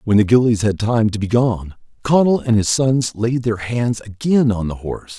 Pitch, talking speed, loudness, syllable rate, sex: 115 Hz, 220 wpm, -17 LUFS, 4.8 syllables/s, male